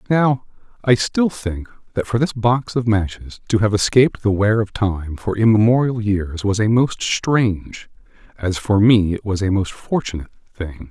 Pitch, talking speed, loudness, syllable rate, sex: 110 Hz, 180 wpm, -18 LUFS, 4.7 syllables/s, male